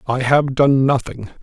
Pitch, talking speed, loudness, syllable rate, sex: 130 Hz, 170 wpm, -16 LUFS, 4.3 syllables/s, male